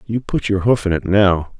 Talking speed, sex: 265 wpm, male